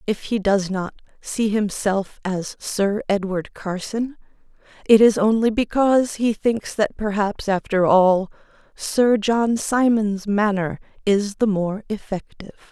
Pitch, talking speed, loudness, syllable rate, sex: 210 Hz, 130 wpm, -20 LUFS, 3.9 syllables/s, female